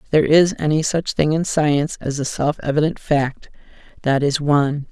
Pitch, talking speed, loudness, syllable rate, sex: 150 Hz, 195 wpm, -19 LUFS, 5.2 syllables/s, female